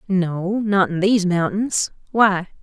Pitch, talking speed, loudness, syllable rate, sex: 195 Hz, 90 wpm, -19 LUFS, 3.7 syllables/s, female